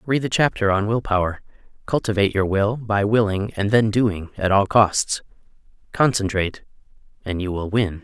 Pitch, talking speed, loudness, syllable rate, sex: 105 Hz, 155 wpm, -20 LUFS, 5.1 syllables/s, male